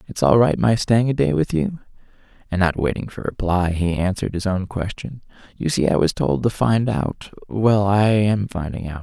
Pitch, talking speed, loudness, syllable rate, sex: 100 Hz, 215 wpm, -20 LUFS, 5.0 syllables/s, male